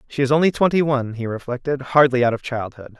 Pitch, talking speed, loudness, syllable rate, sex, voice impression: 130 Hz, 220 wpm, -19 LUFS, 6.4 syllables/s, male, masculine, adult-like, slightly refreshing, slightly sincere, friendly, kind